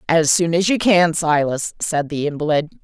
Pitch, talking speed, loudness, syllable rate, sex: 165 Hz, 190 wpm, -18 LUFS, 4.6 syllables/s, female